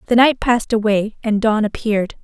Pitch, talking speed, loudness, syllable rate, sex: 220 Hz, 190 wpm, -17 LUFS, 5.7 syllables/s, female